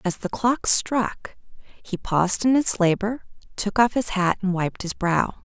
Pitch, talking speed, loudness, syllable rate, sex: 205 Hz, 185 wpm, -22 LUFS, 4.1 syllables/s, female